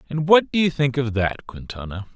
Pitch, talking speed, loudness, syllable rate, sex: 140 Hz, 225 wpm, -20 LUFS, 5.2 syllables/s, male